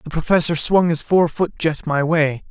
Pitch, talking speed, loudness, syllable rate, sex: 160 Hz, 215 wpm, -17 LUFS, 4.8 syllables/s, male